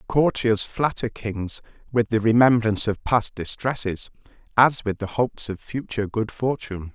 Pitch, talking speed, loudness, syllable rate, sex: 110 Hz, 145 wpm, -23 LUFS, 4.8 syllables/s, male